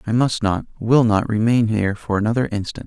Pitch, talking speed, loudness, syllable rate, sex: 110 Hz, 190 wpm, -19 LUFS, 6.0 syllables/s, male